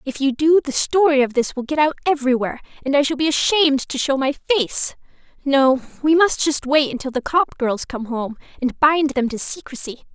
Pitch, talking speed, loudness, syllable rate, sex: 280 Hz, 215 wpm, -19 LUFS, 5.5 syllables/s, female